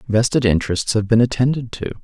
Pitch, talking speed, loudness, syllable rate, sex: 115 Hz, 175 wpm, -18 LUFS, 6.2 syllables/s, male